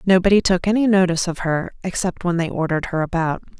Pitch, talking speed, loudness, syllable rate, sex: 180 Hz, 200 wpm, -19 LUFS, 6.6 syllables/s, female